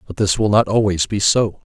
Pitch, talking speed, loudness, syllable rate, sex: 100 Hz, 245 wpm, -17 LUFS, 5.3 syllables/s, male